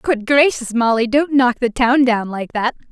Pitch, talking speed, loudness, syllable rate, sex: 250 Hz, 205 wpm, -16 LUFS, 4.4 syllables/s, female